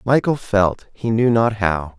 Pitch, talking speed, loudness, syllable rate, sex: 110 Hz, 180 wpm, -18 LUFS, 3.8 syllables/s, male